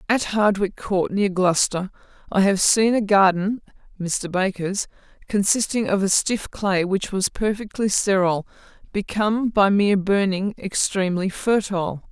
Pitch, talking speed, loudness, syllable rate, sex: 195 Hz, 135 wpm, -21 LUFS, 4.7 syllables/s, female